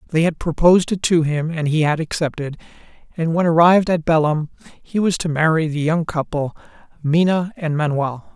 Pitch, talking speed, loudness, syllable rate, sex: 160 Hz, 180 wpm, -18 LUFS, 5.4 syllables/s, male